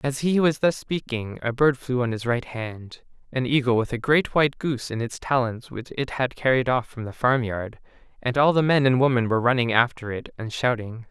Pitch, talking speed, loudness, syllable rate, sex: 125 Hz, 220 wpm, -23 LUFS, 5.3 syllables/s, male